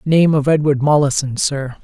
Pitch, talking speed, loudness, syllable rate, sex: 145 Hz, 165 wpm, -15 LUFS, 4.7 syllables/s, male